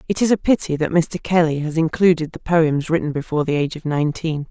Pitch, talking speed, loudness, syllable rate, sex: 160 Hz, 225 wpm, -19 LUFS, 6.2 syllables/s, female